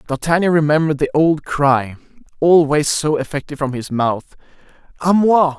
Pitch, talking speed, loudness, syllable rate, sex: 150 Hz, 140 wpm, -16 LUFS, 5.1 syllables/s, male